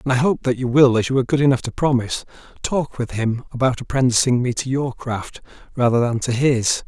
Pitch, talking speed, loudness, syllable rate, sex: 125 Hz, 220 wpm, -19 LUFS, 5.7 syllables/s, male